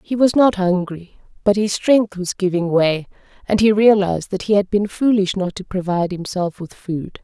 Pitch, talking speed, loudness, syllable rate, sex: 195 Hz, 200 wpm, -18 LUFS, 4.9 syllables/s, female